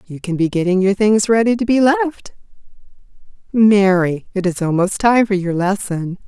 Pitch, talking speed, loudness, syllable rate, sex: 200 Hz, 170 wpm, -16 LUFS, 4.7 syllables/s, female